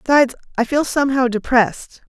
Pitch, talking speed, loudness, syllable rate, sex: 255 Hz, 140 wpm, -17 LUFS, 6.3 syllables/s, female